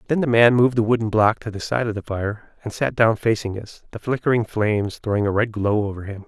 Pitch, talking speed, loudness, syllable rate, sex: 110 Hz, 260 wpm, -20 LUFS, 5.9 syllables/s, male